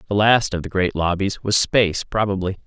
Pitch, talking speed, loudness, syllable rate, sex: 95 Hz, 205 wpm, -19 LUFS, 5.4 syllables/s, male